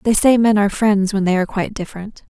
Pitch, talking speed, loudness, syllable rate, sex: 205 Hz, 255 wpm, -16 LUFS, 7.0 syllables/s, female